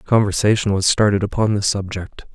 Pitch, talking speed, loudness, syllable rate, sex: 100 Hz, 155 wpm, -18 LUFS, 5.5 syllables/s, male